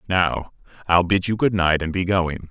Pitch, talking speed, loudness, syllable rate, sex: 90 Hz, 190 wpm, -20 LUFS, 4.6 syllables/s, male